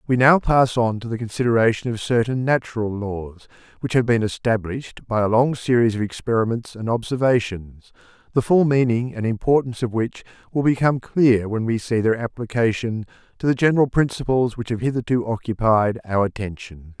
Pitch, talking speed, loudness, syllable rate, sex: 115 Hz, 170 wpm, -21 LUFS, 5.5 syllables/s, male